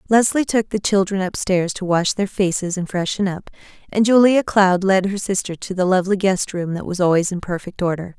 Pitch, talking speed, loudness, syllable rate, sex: 190 Hz, 220 wpm, -19 LUFS, 5.4 syllables/s, female